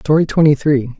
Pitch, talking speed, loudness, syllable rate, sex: 145 Hz, 180 wpm, -14 LUFS, 5.7 syllables/s, male